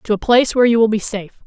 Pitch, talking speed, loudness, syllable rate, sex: 220 Hz, 325 wpm, -15 LUFS, 7.8 syllables/s, female